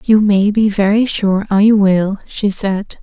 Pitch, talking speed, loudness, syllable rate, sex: 205 Hz, 180 wpm, -14 LUFS, 3.6 syllables/s, female